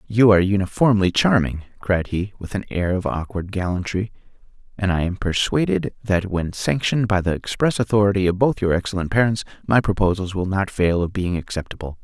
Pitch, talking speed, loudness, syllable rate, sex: 95 Hz, 180 wpm, -21 LUFS, 5.6 syllables/s, male